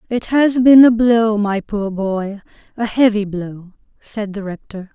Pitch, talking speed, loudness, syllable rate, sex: 215 Hz, 160 wpm, -15 LUFS, 3.8 syllables/s, female